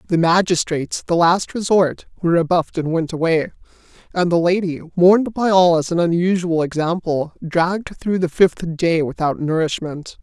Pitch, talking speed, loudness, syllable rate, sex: 170 Hz, 160 wpm, -18 LUFS, 5.1 syllables/s, male